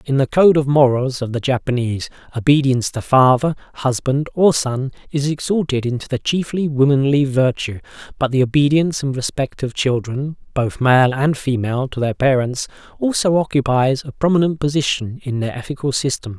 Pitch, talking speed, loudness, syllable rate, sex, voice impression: 135 Hz, 160 wpm, -18 LUFS, 5.3 syllables/s, male, very masculine, adult-like, slightly middle-aged, slightly thick, slightly relaxed, weak, slightly dark, slightly soft, slightly muffled, fluent, slightly cool, very intellectual, refreshing, very sincere, very calm, slightly mature, very friendly, very reassuring, unique, very elegant, sweet, very kind, modest